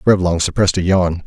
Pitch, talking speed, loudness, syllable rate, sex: 90 Hz, 190 wpm, -16 LUFS, 6.1 syllables/s, male